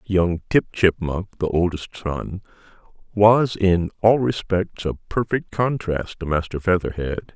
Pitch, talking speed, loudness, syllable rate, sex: 95 Hz, 130 wpm, -21 LUFS, 4.0 syllables/s, male